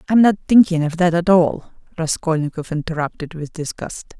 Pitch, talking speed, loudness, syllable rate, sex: 170 Hz, 160 wpm, -18 LUFS, 5.4 syllables/s, female